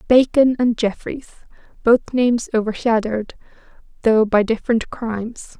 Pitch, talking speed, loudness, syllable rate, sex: 230 Hz, 105 wpm, -18 LUFS, 4.9 syllables/s, female